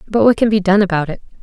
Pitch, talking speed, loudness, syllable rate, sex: 200 Hz, 295 wpm, -14 LUFS, 7.2 syllables/s, female